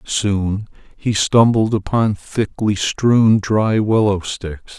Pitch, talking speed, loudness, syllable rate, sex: 105 Hz, 115 wpm, -17 LUFS, 3.0 syllables/s, male